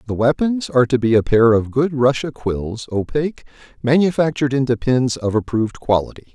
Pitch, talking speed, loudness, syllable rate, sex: 130 Hz, 170 wpm, -18 LUFS, 5.6 syllables/s, male